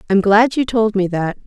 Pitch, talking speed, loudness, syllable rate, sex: 210 Hz, 245 wpm, -16 LUFS, 5.0 syllables/s, female